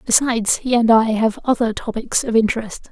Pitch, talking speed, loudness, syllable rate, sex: 230 Hz, 185 wpm, -18 LUFS, 5.5 syllables/s, female